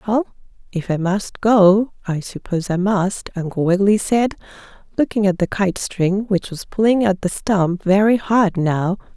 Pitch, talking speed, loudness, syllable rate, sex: 195 Hz, 170 wpm, -18 LUFS, 4.4 syllables/s, female